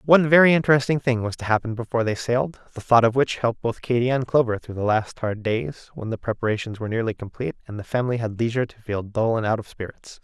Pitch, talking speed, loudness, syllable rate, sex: 120 Hz, 245 wpm, -22 LUFS, 6.8 syllables/s, male